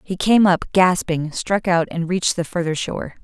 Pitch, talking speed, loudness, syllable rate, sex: 175 Hz, 205 wpm, -19 LUFS, 5.0 syllables/s, female